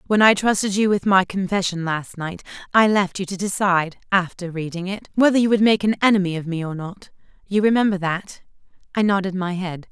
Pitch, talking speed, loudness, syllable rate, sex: 190 Hz, 205 wpm, -20 LUFS, 5.5 syllables/s, female